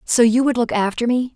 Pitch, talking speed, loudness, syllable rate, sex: 235 Hz, 265 wpm, -18 LUFS, 5.6 syllables/s, female